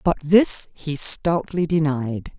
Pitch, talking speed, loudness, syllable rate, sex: 155 Hz, 125 wpm, -19 LUFS, 3.2 syllables/s, female